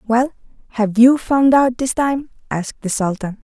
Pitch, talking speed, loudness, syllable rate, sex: 240 Hz, 170 wpm, -17 LUFS, 4.7 syllables/s, female